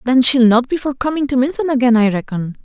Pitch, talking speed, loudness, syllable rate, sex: 255 Hz, 250 wpm, -15 LUFS, 6.1 syllables/s, female